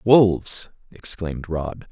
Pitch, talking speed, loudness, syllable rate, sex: 95 Hz, 95 wpm, -22 LUFS, 3.7 syllables/s, male